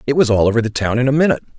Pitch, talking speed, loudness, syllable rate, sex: 125 Hz, 340 wpm, -16 LUFS, 9.0 syllables/s, male